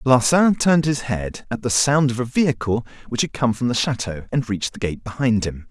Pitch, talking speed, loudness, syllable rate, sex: 125 Hz, 230 wpm, -20 LUFS, 5.5 syllables/s, male